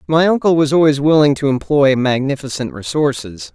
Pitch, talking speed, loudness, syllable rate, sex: 140 Hz, 150 wpm, -15 LUFS, 5.3 syllables/s, male